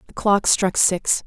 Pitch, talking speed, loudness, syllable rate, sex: 195 Hz, 190 wpm, -18 LUFS, 3.7 syllables/s, female